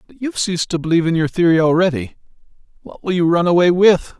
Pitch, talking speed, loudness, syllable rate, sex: 175 Hz, 215 wpm, -16 LUFS, 6.9 syllables/s, male